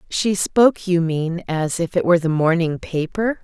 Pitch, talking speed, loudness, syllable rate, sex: 175 Hz, 190 wpm, -19 LUFS, 4.7 syllables/s, female